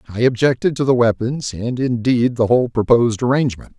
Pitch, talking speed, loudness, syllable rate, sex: 120 Hz, 175 wpm, -17 LUFS, 5.9 syllables/s, male